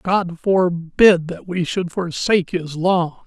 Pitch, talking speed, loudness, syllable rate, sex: 175 Hz, 145 wpm, -18 LUFS, 3.5 syllables/s, male